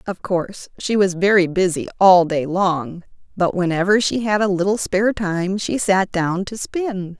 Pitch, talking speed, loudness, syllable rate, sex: 190 Hz, 185 wpm, -18 LUFS, 4.5 syllables/s, female